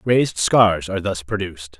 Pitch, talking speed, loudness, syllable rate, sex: 100 Hz, 165 wpm, -19 LUFS, 5.3 syllables/s, male